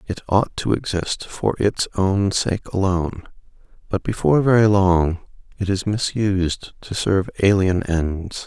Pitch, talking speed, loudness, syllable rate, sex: 95 Hz, 140 wpm, -20 LUFS, 4.4 syllables/s, male